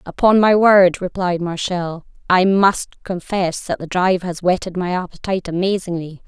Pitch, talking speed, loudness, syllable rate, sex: 180 Hz, 155 wpm, -18 LUFS, 4.9 syllables/s, female